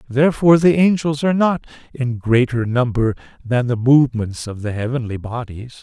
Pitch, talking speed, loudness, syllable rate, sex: 130 Hz, 155 wpm, -18 LUFS, 5.3 syllables/s, male